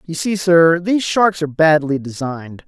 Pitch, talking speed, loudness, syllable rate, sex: 165 Hz, 180 wpm, -16 LUFS, 5.1 syllables/s, male